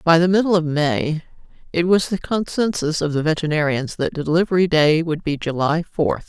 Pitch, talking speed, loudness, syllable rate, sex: 160 Hz, 180 wpm, -19 LUFS, 5.3 syllables/s, female